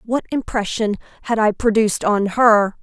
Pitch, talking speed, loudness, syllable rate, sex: 220 Hz, 150 wpm, -18 LUFS, 4.9 syllables/s, female